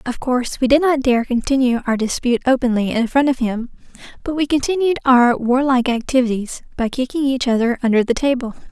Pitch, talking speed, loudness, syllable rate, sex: 255 Hz, 195 wpm, -17 LUFS, 5.8 syllables/s, female